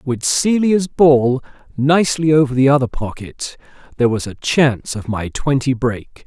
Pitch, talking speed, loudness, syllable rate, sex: 135 Hz, 155 wpm, -16 LUFS, 4.6 syllables/s, male